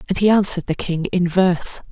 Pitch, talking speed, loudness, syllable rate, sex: 180 Hz, 220 wpm, -18 LUFS, 6.1 syllables/s, female